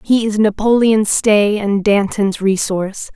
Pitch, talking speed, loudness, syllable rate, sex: 205 Hz, 135 wpm, -15 LUFS, 4.0 syllables/s, female